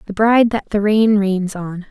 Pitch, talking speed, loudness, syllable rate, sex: 205 Hz, 220 wpm, -16 LUFS, 4.6 syllables/s, female